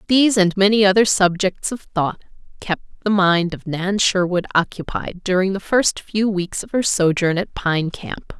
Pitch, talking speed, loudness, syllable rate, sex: 190 Hz, 180 wpm, -19 LUFS, 4.4 syllables/s, female